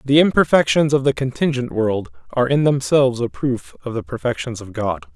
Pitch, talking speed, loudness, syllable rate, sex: 130 Hz, 185 wpm, -19 LUFS, 5.5 syllables/s, male